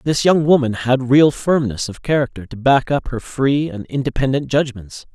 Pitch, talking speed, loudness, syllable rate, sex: 130 Hz, 185 wpm, -17 LUFS, 4.8 syllables/s, male